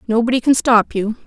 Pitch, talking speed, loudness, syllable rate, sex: 230 Hz, 190 wpm, -16 LUFS, 5.8 syllables/s, female